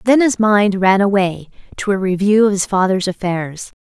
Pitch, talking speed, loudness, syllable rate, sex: 195 Hz, 190 wpm, -15 LUFS, 4.8 syllables/s, female